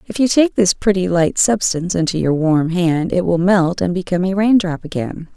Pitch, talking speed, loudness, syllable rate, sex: 180 Hz, 225 wpm, -16 LUFS, 5.2 syllables/s, female